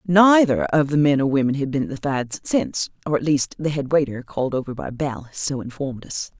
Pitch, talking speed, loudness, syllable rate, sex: 140 Hz, 235 wpm, -21 LUFS, 5.7 syllables/s, female